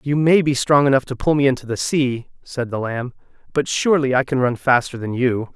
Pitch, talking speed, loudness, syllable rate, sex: 135 Hz, 240 wpm, -19 LUFS, 5.5 syllables/s, male